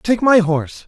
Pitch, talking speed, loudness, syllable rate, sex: 195 Hz, 205 wpm, -15 LUFS, 4.8 syllables/s, male